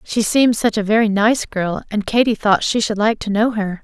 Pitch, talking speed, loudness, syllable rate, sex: 215 Hz, 250 wpm, -17 LUFS, 5.2 syllables/s, female